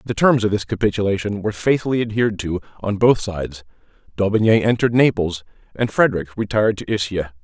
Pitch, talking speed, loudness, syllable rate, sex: 105 Hz, 160 wpm, -19 LUFS, 6.4 syllables/s, male